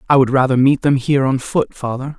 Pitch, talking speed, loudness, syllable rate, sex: 135 Hz, 245 wpm, -16 LUFS, 6.0 syllables/s, male